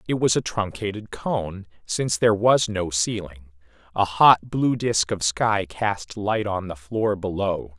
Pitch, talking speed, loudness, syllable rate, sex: 100 Hz, 170 wpm, -23 LUFS, 4.1 syllables/s, male